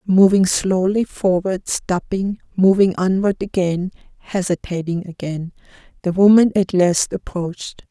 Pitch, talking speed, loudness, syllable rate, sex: 185 Hz, 75 wpm, -18 LUFS, 4.2 syllables/s, female